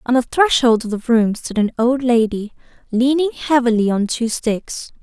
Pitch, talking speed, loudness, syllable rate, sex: 240 Hz, 180 wpm, -17 LUFS, 4.6 syllables/s, female